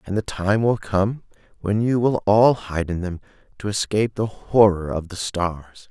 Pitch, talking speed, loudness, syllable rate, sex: 100 Hz, 195 wpm, -21 LUFS, 4.4 syllables/s, male